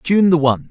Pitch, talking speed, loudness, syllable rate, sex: 160 Hz, 255 wpm, -14 LUFS, 6.0 syllables/s, male